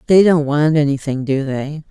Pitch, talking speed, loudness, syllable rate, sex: 145 Hz, 190 wpm, -16 LUFS, 4.8 syllables/s, female